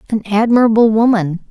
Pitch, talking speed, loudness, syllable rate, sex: 220 Hz, 120 wpm, -13 LUFS, 5.8 syllables/s, female